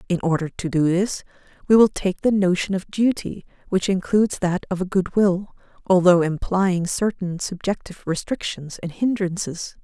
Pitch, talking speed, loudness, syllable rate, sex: 185 Hz, 160 wpm, -21 LUFS, 4.8 syllables/s, female